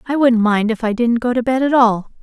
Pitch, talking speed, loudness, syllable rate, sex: 240 Hz, 295 wpm, -16 LUFS, 5.5 syllables/s, female